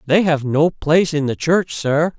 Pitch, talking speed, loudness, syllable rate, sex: 155 Hz, 220 wpm, -17 LUFS, 4.3 syllables/s, male